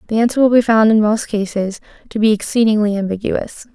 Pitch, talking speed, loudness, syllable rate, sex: 215 Hz, 190 wpm, -15 LUFS, 5.9 syllables/s, female